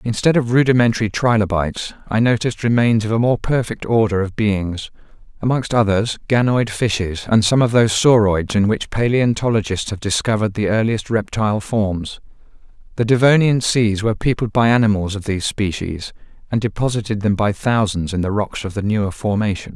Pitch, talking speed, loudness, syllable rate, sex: 110 Hz, 165 wpm, -18 LUFS, 5.6 syllables/s, male